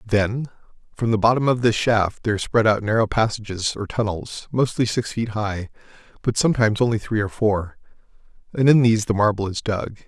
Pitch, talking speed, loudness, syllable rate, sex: 110 Hz, 185 wpm, -21 LUFS, 5.4 syllables/s, male